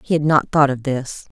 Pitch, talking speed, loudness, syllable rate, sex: 145 Hz, 260 wpm, -18 LUFS, 5.1 syllables/s, female